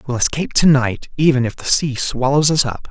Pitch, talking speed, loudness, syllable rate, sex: 135 Hz, 205 wpm, -16 LUFS, 5.5 syllables/s, male